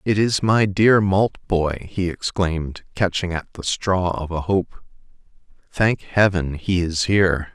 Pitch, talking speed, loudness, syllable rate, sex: 90 Hz, 150 wpm, -20 LUFS, 3.9 syllables/s, male